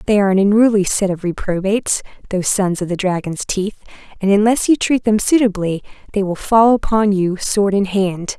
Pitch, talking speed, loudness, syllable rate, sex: 200 Hz, 195 wpm, -16 LUFS, 5.4 syllables/s, female